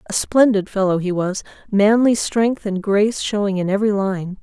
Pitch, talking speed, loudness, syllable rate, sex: 205 Hz, 175 wpm, -18 LUFS, 5.1 syllables/s, female